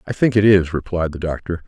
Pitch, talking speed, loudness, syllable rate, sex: 90 Hz, 250 wpm, -18 LUFS, 5.8 syllables/s, male